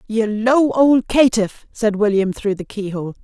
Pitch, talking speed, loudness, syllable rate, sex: 220 Hz, 165 wpm, -17 LUFS, 4.8 syllables/s, female